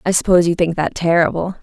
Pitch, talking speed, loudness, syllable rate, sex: 170 Hz, 220 wpm, -16 LUFS, 6.8 syllables/s, female